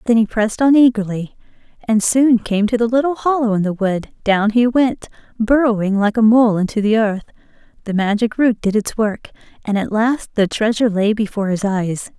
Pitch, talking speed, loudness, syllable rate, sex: 220 Hz, 195 wpm, -16 LUFS, 5.3 syllables/s, female